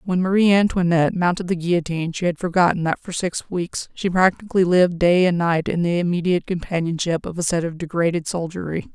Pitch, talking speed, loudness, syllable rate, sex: 175 Hz, 195 wpm, -20 LUFS, 6.1 syllables/s, female